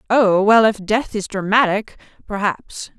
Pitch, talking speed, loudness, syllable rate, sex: 210 Hz, 120 wpm, -17 LUFS, 4.1 syllables/s, female